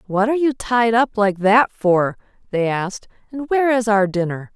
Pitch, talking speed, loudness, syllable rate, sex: 220 Hz, 195 wpm, -18 LUFS, 5.0 syllables/s, female